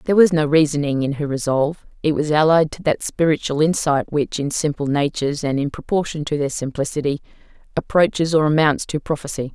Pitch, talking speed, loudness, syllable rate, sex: 150 Hz, 180 wpm, -19 LUFS, 5.8 syllables/s, female